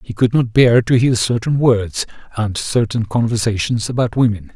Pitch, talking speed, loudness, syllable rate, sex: 115 Hz, 170 wpm, -16 LUFS, 4.8 syllables/s, male